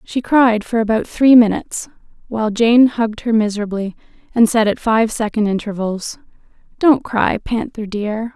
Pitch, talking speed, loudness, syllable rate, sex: 225 Hz, 150 wpm, -16 LUFS, 4.8 syllables/s, female